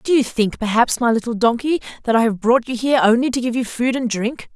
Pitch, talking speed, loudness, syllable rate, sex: 240 Hz, 265 wpm, -18 LUFS, 6.0 syllables/s, female